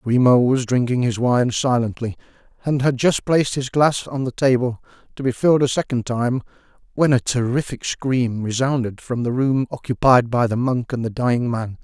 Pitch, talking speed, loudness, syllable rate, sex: 125 Hz, 190 wpm, -20 LUFS, 5.0 syllables/s, male